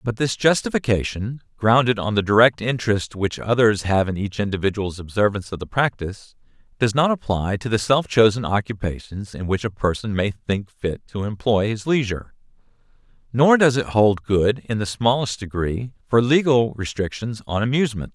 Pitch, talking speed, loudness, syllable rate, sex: 110 Hz, 170 wpm, -21 LUFS, 5.2 syllables/s, male